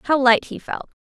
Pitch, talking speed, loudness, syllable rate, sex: 265 Hz, 230 wpm, -19 LUFS, 4.5 syllables/s, female